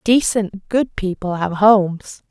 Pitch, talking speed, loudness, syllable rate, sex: 200 Hz, 130 wpm, -17 LUFS, 3.8 syllables/s, female